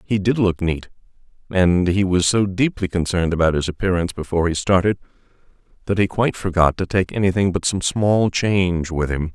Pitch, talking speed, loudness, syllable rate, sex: 95 Hz, 185 wpm, -19 LUFS, 5.7 syllables/s, male